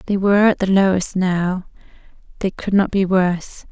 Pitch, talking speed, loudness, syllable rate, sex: 190 Hz, 180 wpm, -18 LUFS, 5.0 syllables/s, female